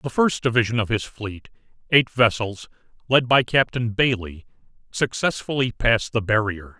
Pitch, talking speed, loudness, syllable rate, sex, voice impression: 115 Hz, 140 wpm, -21 LUFS, 4.7 syllables/s, male, very masculine, slightly middle-aged, thick, slightly tensed, slightly powerful, bright, soft, slightly muffled, fluent, cool, intellectual, very refreshing, sincere, calm, slightly mature, very friendly, very reassuring, unique, slightly elegant, wild, slightly sweet, lively, kind, slightly intense